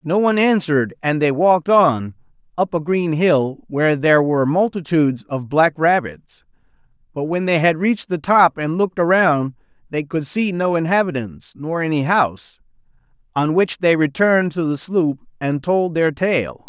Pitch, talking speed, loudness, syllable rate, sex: 165 Hz, 170 wpm, -18 LUFS, 4.9 syllables/s, male